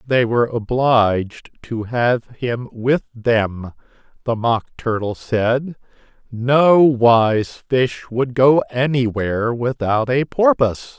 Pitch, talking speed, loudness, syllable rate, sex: 120 Hz, 115 wpm, -18 LUFS, 3.2 syllables/s, male